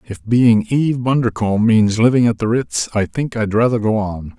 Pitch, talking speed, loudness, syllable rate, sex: 110 Hz, 205 wpm, -16 LUFS, 5.0 syllables/s, male